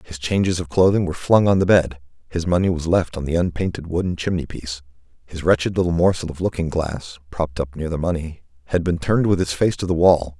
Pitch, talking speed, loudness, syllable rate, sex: 85 Hz, 230 wpm, -20 LUFS, 5.7 syllables/s, male